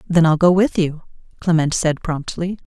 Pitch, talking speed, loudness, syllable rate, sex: 165 Hz, 175 wpm, -18 LUFS, 4.8 syllables/s, female